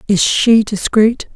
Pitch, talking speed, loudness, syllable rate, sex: 215 Hz, 135 wpm, -13 LUFS, 3.5 syllables/s, female